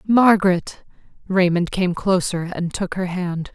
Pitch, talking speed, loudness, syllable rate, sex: 185 Hz, 135 wpm, -20 LUFS, 4.0 syllables/s, female